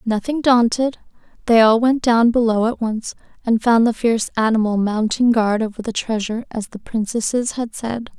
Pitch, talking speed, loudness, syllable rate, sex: 230 Hz, 175 wpm, -18 LUFS, 5.0 syllables/s, female